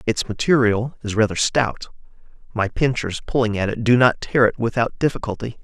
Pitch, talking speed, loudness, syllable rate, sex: 115 Hz, 170 wpm, -20 LUFS, 5.4 syllables/s, male